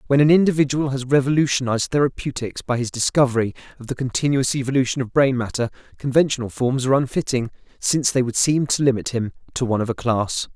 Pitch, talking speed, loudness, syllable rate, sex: 130 Hz, 180 wpm, -20 LUFS, 6.6 syllables/s, male